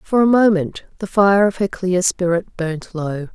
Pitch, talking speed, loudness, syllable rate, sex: 185 Hz, 195 wpm, -18 LUFS, 4.3 syllables/s, female